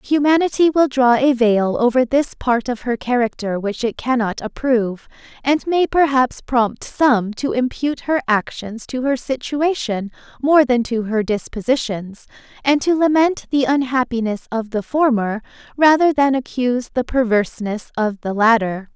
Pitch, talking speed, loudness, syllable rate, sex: 250 Hz, 150 wpm, -18 LUFS, 4.6 syllables/s, female